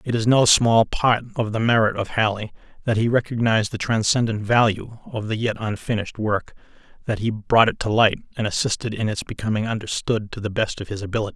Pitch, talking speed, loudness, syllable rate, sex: 110 Hz, 205 wpm, -21 LUFS, 5.9 syllables/s, male